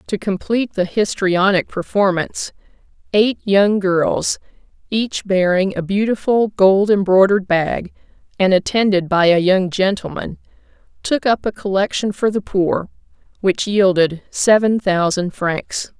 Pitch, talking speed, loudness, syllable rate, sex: 195 Hz, 125 wpm, -17 LUFS, 4.2 syllables/s, female